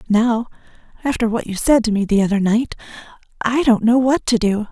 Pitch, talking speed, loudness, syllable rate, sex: 225 Hz, 205 wpm, -17 LUFS, 5.4 syllables/s, female